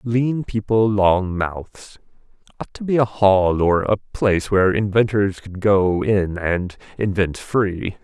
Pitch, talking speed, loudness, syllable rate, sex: 100 Hz, 150 wpm, -19 LUFS, 3.7 syllables/s, male